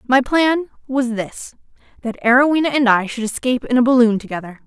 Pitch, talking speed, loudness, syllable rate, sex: 250 Hz, 165 wpm, -17 LUFS, 5.7 syllables/s, female